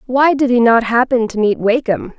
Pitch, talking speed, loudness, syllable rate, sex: 240 Hz, 220 wpm, -14 LUFS, 5.1 syllables/s, female